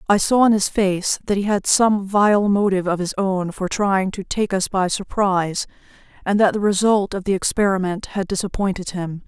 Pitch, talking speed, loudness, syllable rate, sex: 195 Hz, 200 wpm, -19 LUFS, 5.0 syllables/s, female